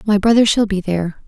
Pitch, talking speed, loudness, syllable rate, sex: 205 Hz, 235 wpm, -15 LUFS, 6.2 syllables/s, female